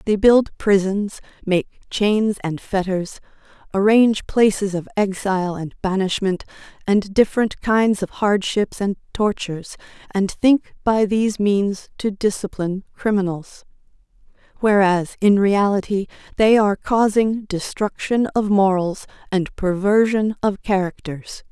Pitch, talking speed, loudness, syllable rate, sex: 200 Hz, 115 wpm, -19 LUFS, 4.2 syllables/s, female